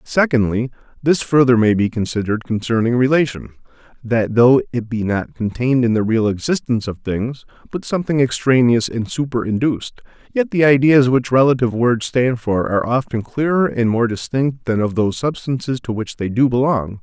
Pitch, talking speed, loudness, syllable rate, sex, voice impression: 120 Hz, 170 wpm, -17 LUFS, 5.4 syllables/s, male, very masculine, very adult-like, slightly thick, slightly muffled, cool, sincere, friendly